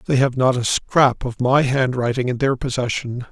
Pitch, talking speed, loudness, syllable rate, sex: 125 Hz, 200 wpm, -19 LUFS, 4.8 syllables/s, male